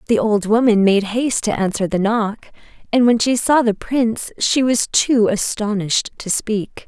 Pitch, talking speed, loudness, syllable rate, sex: 220 Hz, 185 wpm, -17 LUFS, 4.6 syllables/s, female